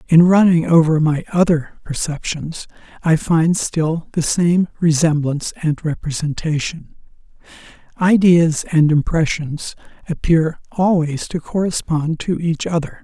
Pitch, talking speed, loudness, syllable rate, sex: 160 Hz, 110 wpm, -17 LUFS, 4.2 syllables/s, male